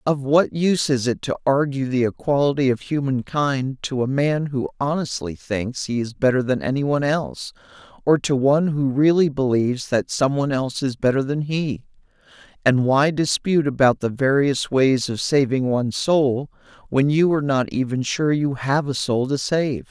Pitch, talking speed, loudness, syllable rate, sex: 135 Hz, 185 wpm, -20 LUFS, 5.0 syllables/s, male